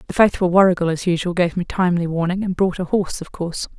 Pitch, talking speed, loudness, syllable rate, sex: 180 Hz, 240 wpm, -19 LUFS, 6.8 syllables/s, female